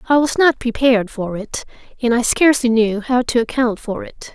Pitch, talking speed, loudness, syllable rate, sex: 240 Hz, 205 wpm, -17 LUFS, 5.3 syllables/s, female